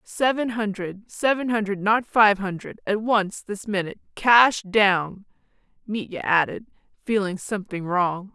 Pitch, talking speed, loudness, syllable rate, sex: 205 Hz, 130 wpm, -22 LUFS, 4.3 syllables/s, female